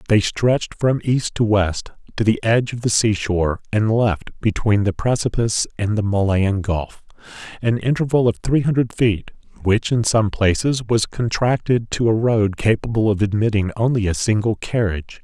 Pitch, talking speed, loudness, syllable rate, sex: 110 Hz, 175 wpm, -19 LUFS, 4.9 syllables/s, male